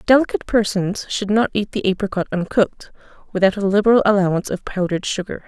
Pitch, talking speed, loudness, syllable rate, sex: 200 Hz, 165 wpm, -19 LUFS, 6.7 syllables/s, female